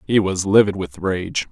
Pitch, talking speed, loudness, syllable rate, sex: 100 Hz, 200 wpm, -19 LUFS, 4.4 syllables/s, male